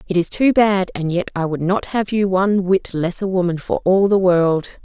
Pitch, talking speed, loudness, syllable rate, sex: 185 Hz, 250 wpm, -18 LUFS, 5.0 syllables/s, female